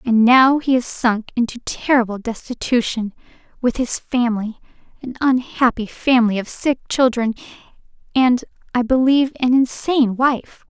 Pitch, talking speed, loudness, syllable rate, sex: 245 Hz, 125 wpm, -18 LUFS, 4.8 syllables/s, female